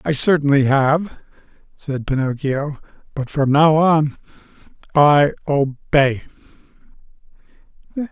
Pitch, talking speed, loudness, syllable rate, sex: 145 Hz, 80 wpm, -17 LUFS, 3.7 syllables/s, male